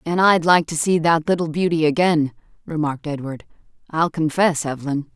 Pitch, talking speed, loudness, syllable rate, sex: 160 Hz, 165 wpm, -19 LUFS, 5.3 syllables/s, female